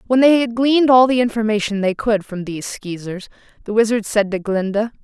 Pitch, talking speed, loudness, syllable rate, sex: 220 Hz, 205 wpm, -17 LUFS, 5.7 syllables/s, female